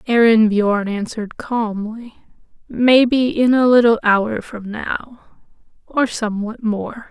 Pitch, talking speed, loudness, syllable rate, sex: 225 Hz, 110 wpm, -17 LUFS, 3.7 syllables/s, female